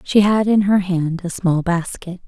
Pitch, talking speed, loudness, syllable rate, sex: 185 Hz, 210 wpm, -17 LUFS, 4.3 syllables/s, female